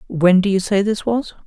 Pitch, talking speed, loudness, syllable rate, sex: 200 Hz, 245 wpm, -17 LUFS, 5.0 syllables/s, female